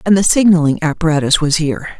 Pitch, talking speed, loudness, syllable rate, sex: 165 Hz, 180 wpm, -13 LUFS, 6.7 syllables/s, female